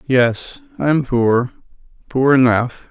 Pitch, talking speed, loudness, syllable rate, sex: 135 Hz, 125 wpm, -16 LUFS, 3.4 syllables/s, male